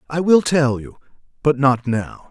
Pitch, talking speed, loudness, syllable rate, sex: 140 Hz, 155 wpm, -18 LUFS, 4.2 syllables/s, male